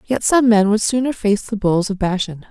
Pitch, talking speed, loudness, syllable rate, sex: 210 Hz, 240 wpm, -17 LUFS, 5.0 syllables/s, female